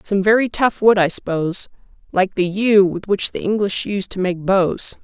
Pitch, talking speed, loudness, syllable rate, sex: 195 Hz, 205 wpm, -18 LUFS, 4.7 syllables/s, female